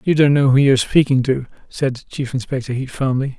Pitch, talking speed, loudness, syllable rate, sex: 135 Hz, 215 wpm, -17 LUFS, 5.5 syllables/s, male